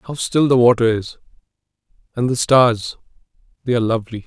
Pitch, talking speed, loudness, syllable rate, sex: 120 Hz, 155 wpm, -17 LUFS, 5.8 syllables/s, male